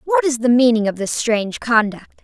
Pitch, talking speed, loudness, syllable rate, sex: 235 Hz, 215 wpm, -17 LUFS, 5.6 syllables/s, female